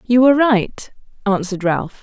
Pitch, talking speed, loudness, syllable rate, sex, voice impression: 215 Hz, 150 wpm, -16 LUFS, 5.0 syllables/s, female, very feminine, slightly young, very adult-like, thin, tensed, slightly powerful, bright, hard, very clear, very fluent, slightly raspy, cute, slightly cool, intellectual, very refreshing, very sincere, slightly calm, friendly, reassuring, slightly unique, elegant, slightly wild, slightly sweet, lively, strict, slightly intense, sharp